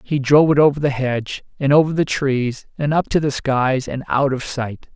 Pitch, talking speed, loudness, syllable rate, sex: 135 Hz, 230 wpm, -18 LUFS, 5.0 syllables/s, male